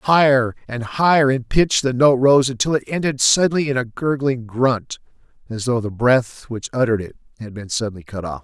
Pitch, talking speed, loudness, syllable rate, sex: 125 Hz, 200 wpm, -18 LUFS, 5.2 syllables/s, male